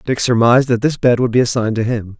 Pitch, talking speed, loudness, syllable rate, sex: 120 Hz, 275 wpm, -15 LUFS, 6.7 syllables/s, male